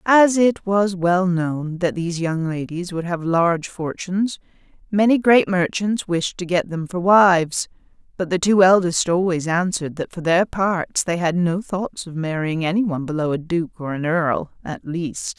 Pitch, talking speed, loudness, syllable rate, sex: 175 Hz, 185 wpm, -20 LUFS, 4.5 syllables/s, female